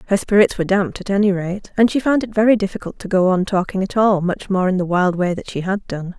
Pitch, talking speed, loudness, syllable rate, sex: 195 Hz, 280 wpm, -18 LUFS, 6.2 syllables/s, female